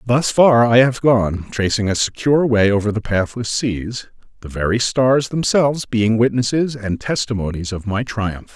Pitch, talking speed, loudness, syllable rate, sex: 115 Hz, 170 wpm, -17 LUFS, 4.6 syllables/s, male